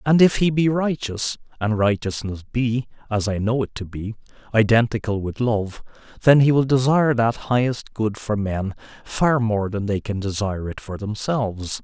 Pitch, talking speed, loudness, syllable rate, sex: 115 Hz, 165 wpm, -21 LUFS, 4.8 syllables/s, male